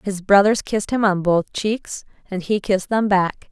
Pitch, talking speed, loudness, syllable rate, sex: 200 Hz, 205 wpm, -19 LUFS, 4.7 syllables/s, female